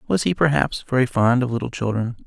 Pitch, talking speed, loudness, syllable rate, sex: 120 Hz, 210 wpm, -21 LUFS, 6.1 syllables/s, male